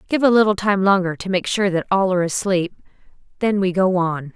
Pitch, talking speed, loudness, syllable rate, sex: 190 Hz, 220 wpm, -19 LUFS, 5.8 syllables/s, female